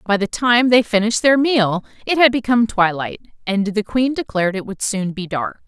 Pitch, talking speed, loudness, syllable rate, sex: 220 Hz, 210 wpm, -17 LUFS, 5.3 syllables/s, female